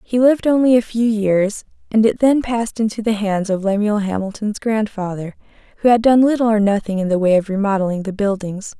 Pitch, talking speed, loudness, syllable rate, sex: 210 Hz, 205 wpm, -17 LUFS, 5.7 syllables/s, female